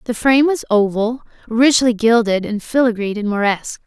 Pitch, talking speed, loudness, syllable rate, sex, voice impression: 230 Hz, 155 wpm, -16 LUFS, 5.3 syllables/s, female, feminine, adult-like, tensed, powerful, bright, clear, fluent, intellectual, slightly friendly, lively, slightly intense, sharp